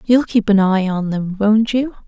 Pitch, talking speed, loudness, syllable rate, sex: 210 Hz, 230 wpm, -16 LUFS, 4.4 syllables/s, female